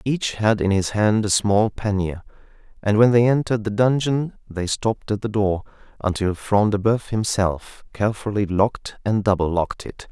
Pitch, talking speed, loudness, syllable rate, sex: 105 Hz, 180 wpm, -21 LUFS, 4.8 syllables/s, male